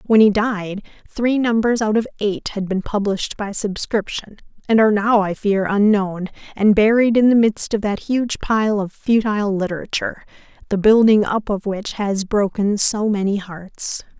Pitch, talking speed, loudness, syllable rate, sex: 210 Hz, 175 wpm, -18 LUFS, 4.6 syllables/s, female